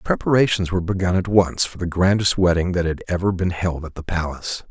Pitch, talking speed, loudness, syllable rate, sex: 90 Hz, 215 wpm, -20 LUFS, 6.0 syllables/s, male